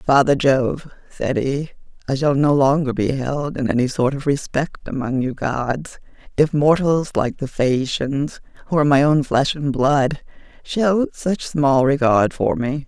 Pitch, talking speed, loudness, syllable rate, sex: 140 Hz, 170 wpm, -19 LUFS, 4.1 syllables/s, female